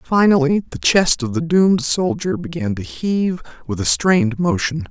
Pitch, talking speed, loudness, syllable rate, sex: 150 Hz, 170 wpm, -17 LUFS, 4.8 syllables/s, male